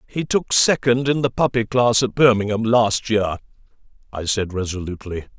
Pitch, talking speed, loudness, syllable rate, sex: 115 Hz, 155 wpm, -19 LUFS, 5.2 syllables/s, male